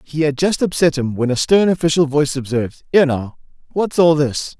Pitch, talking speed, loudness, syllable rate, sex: 150 Hz, 210 wpm, -17 LUFS, 5.6 syllables/s, male